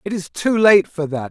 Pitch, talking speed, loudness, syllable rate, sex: 175 Hz, 275 wpm, -17 LUFS, 4.9 syllables/s, male